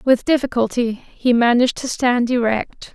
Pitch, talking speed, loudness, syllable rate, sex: 245 Hz, 145 wpm, -18 LUFS, 4.6 syllables/s, female